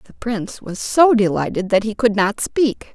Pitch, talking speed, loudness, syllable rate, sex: 215 Hz, 205 wpm, -18 LUFS, 4.7 syllables/s, female